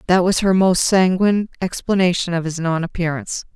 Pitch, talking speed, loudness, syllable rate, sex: 180 Hz, 170 wpm, -18 LUFS, 5.7 syllables/s, female